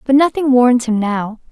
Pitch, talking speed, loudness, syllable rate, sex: 250 Hz, 200 wpm, -14 LUFS, 4.5 syllables/s, female